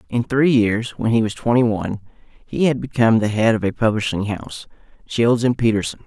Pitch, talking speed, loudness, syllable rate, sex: 115 Hz, 190 wpm, -19 LUFS, 5.6 syllables/s, male